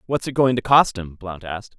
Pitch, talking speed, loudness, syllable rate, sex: 110 Hz, 270 wpm, -19 LUFS, 5.5 syllables/s, male